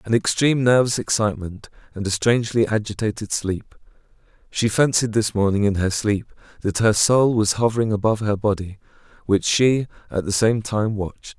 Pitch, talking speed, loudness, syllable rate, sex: 105 Hz, 165 wpm, -20 LUFS, 5.4 syllables/s, male